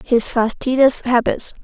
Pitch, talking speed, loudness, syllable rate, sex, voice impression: 245 Hz, 110 wpm, -16 LUFS, 4.1 syllables/s, female, feminine, adult-like, relaxed, slightly weak, soft, slightly muffled, raspy, slightly intellectual, calm, slightly reassuring, slightly modest